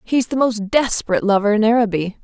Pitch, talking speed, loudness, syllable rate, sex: 220 Hz, 190 wpm, -17 LUFS, 6.2 syllables/s, female